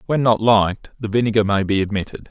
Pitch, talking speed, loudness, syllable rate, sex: 105 Hz, 210 wpm, -18 LUFS, 6.2 syllables/s, male